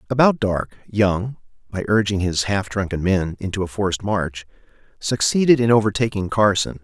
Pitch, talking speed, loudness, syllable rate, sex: 105 Hz, 150 wpm, -20 LUFS, 5.1 syllables/s, male